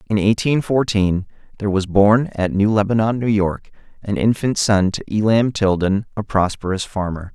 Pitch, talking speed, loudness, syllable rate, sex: 105 Hz, 165 wpm, -18 LUFS, 4.8 syllables/s, male